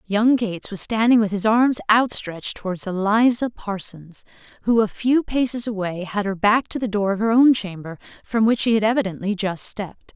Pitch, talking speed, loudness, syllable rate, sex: 215 Hz, 195 wpm, -20 LUFS, 5.2 syllables/s, female